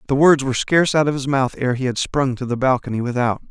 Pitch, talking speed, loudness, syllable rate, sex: 135 Hz, 275 wpm, -19 LUFS, 6.5 syllables/s, male